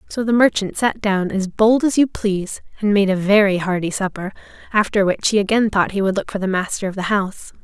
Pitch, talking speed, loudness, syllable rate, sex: 200 Hz, 235 wpm, -18 LUFS, 5.7 syllables/s, female